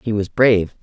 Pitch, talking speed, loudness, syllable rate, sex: 105 Hz, 215 wpm, -16 LUFS, 5.8 syllables/s, female